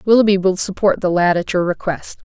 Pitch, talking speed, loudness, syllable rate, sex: 190 Hz, 205 wpm, -16 LUFS, 5.7 syllables/s, female